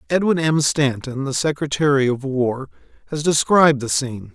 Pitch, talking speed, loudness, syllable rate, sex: 140 Hz, 150 wpm, -19 LUFS, 5.1 syllables/s, male